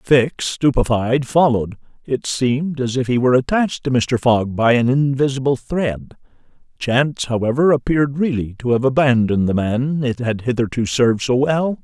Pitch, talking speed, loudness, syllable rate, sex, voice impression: 130 Hz, 160 wpm, -18 LUFS, 5.1 syllables/s, male, very masculine, very adult-like, old, very thick, relaxed, powerful, bright, hard, muffled, slightly fluent, slightly raspy, cool, intellectual, sincere, calm, very mature, very friendly, reassuring, very unique, very wild, slightly lively, strict